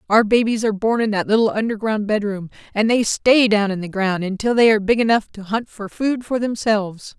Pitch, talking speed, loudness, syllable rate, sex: 215 Hz, 225 wpm, -18 LUFS, 5.6 syllables/s, female